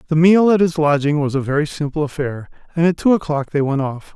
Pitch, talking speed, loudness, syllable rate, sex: 155 Hz, 245 wpm, -17 LUFS, 6.0 syllables/s, male